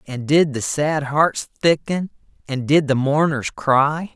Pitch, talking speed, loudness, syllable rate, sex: 145 Hz, 160 wpm, -19 LUFS, 3.7 syllables/s, male